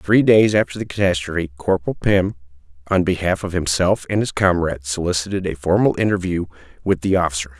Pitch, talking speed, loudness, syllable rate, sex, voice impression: 90 Hz, 165 wpm, -19 LUFS, 6.1 syllables/s, male, very masculine, very thick, very tensed, very powerful, bright, hard, very clear, very fluent, very cool, intellectual, refreshing, slightly sincere, calm, very friendly, reassuring, very unique, elegant, very wild, sweet, lively, kind, slightly intense